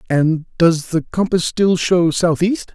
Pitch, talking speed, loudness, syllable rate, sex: 170 Hz, 155 wpm, -17 LUFS, 3.5 syllables/s, male